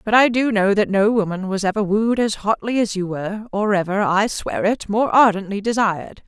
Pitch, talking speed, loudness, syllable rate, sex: 210 Hz, 190 wpm, -19 LUFS, 5.3 syllables/s, female